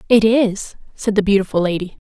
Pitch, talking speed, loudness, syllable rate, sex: 205 Hz, 175 wpm, -17 LUFS, 5.4 syllables/s, female